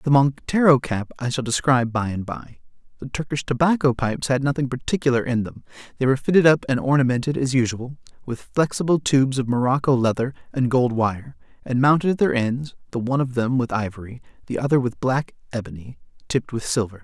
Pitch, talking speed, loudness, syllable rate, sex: 130 Hz, 185 wpm, -21 LUFS, 5.9 syllables/s, male